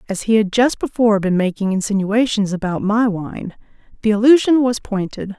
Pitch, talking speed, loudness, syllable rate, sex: 215 Hz, 165 wpm, -17 LUFS, 5.3 syllables/s, female